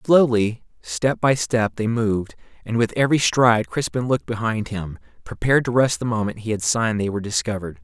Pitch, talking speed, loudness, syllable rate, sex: 115 Hz, 190 wpm, -21 LUFS, 5.8 syllables/s, male